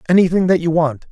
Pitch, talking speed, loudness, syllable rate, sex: 170 Hz, 215 wpm, -15 LUFS, 6.5 syllables/s, male